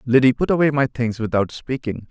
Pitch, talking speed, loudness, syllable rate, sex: 125 Hz, 200 wpm, -20 LUFS, 5.5 syllables/s, male